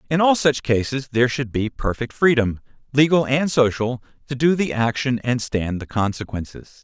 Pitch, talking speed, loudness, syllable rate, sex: 125 Hz, 175 wpm, -20 LUFS, 5.0 syllables/s, male